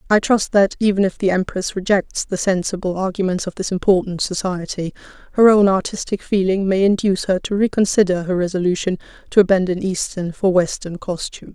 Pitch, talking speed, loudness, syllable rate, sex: 190 Hz, 165 wpm, -18 LUFS, 5.7 syllables/s, female